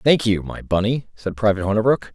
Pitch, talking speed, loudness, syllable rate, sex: 105 Hz, 195 wpm, -20 LUFS, 6.2 syllables/s, male